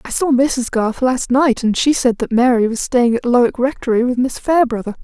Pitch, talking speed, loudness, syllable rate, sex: 250 Hz, 225 wpm, -16 LUFS, 5.4 syllables/s, female